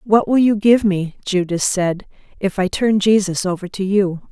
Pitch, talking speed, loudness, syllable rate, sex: 195 Hz, 195 wpm, -17 LUFS, 4.6 syllables/s, female